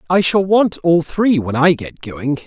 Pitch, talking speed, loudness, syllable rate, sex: 165 Hz, 220 wpm, -16 LUFS, 4.2 syllables/s, male